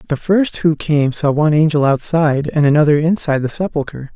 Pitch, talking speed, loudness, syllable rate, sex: 155 Hz, 190 wpm, -15 LUFS, 5.9 syllables/s, male